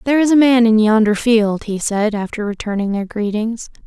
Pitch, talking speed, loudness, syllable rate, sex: 220 Hz, 200 wpm, -16 LUFS, 5.3 syllables/s, female